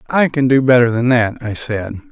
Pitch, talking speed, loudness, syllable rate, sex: 125 Hz, 225 wpm, -15 LUFS, 5.1 syllables/s, male